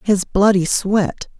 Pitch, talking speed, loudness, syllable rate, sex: 195 Hz, 130 wpm, -17 LUFS, 3.3 syllables/s, female